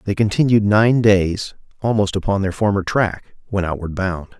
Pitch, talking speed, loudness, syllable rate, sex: 100 Hz, 165 wpm, -18 LUFS, 4.8 syllables/s, male